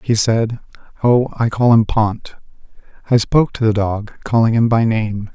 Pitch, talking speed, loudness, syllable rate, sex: 110 Hz, 180 wpm, -16 LUFS, 4.5 syllables/s, male